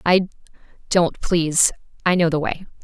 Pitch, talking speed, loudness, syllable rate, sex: 170 Hz, 125 wpm, -20 LUFS, 4.9 syllables/s, female